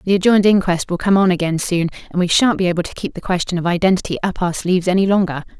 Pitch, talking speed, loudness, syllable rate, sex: 180 Hz, 255 wpm, -17 LUFS, 7.1 syllables/s, female